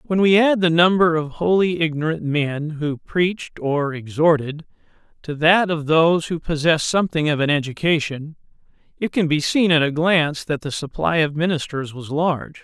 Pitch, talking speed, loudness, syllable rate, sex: 160 Hz, 175 wpm, -19 LUFS, 5.0 syllables/s, male